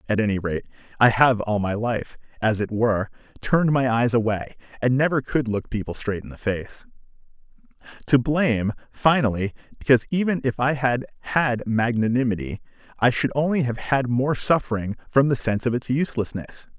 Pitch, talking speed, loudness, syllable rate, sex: 120 Hz, 170 wpm, -22 LUFS, 5.6 syllables/s, male